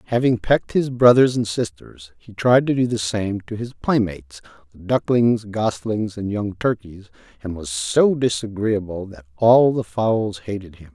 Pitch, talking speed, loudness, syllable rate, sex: 110 Hz, 170 wpm, -20 LUFS, 4.4 syllables/s, male